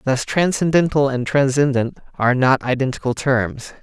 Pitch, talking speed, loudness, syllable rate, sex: 135 Hz, 125 wpm, -18 LUFS, 4.9 syllables/s, male